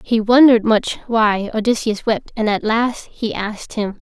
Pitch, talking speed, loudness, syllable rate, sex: 220 Hz, 175 wpm, -17 LUFS, 4.6 syllables/s, female